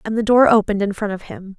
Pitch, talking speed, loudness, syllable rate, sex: 210 Hz, 305 wpm, -17 LUFS, 6.7 syllables/s, female